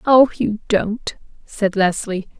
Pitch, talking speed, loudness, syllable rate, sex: 210 Hz, 125 wpm, -19 LUFS, 3.4 syllables/s, female